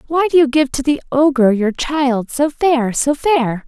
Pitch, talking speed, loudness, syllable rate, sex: 275 Hz, 210 wpm, -15 LUFS, 4.2 syllables/s, female